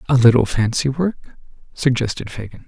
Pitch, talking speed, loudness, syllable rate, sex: 125 Hz, 135 wpm, -18 LUFS, 5.1 syllables/s, male